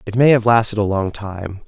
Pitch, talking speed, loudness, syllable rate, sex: 105 Hz, 250 wpm, -17 LUFS, 5.2 syllables/s, male